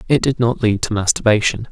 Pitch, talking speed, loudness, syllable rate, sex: 110 Hz, 210 wpm, -17 LUFS, 5.9 syllables/s, male